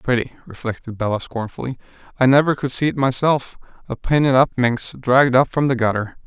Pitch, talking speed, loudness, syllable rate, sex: 130 Hz, 180 wpm, -19 LUFS, 5.8 syllables/s, male